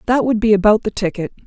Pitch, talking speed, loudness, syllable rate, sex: 215 Hz, 245 wpm, -16 LUFS, 6.7 syllables/s, female